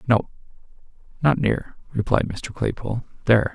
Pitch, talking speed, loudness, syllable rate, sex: 120 Hz, 120 wpm, -23 LUFS, 5.3 syllables/s, male